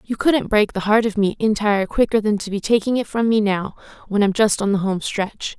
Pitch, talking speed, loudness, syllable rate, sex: 210 Hz, 260 wpm, -19 LUFS, 5.5 syllables/s, female